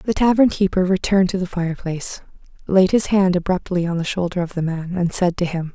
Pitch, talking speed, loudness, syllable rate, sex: 180 Hz, 220 wpm, -19 LUFS, 6.0 syllables/s, female